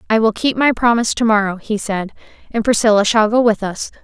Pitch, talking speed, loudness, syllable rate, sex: 220 Hz, 225 wpm, -16 LUFS, 6.1 syllables/s, female